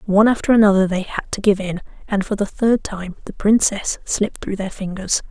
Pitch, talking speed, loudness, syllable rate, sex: 200 Hz, 215 wpm, -19 LUFS, 5.5 syllables/s, female